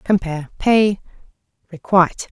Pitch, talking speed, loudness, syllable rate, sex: 185 Hz, 75 wpm, -17 LUFS, 4.8 syllables/s, female